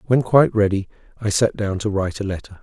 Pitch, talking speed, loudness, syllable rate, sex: 105 Hz, 230 wpm, -20 LUFS, 6.4 syllables/s, male